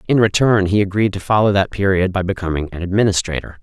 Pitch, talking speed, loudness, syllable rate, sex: 95 Hz, 200 wpm, -17 LUFS, 6.4 syllables/s, male